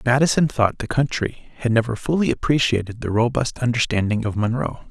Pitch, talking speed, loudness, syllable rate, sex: 120 Hz, 160 wpm, -21 LUFS, 5.7 syllables/s, male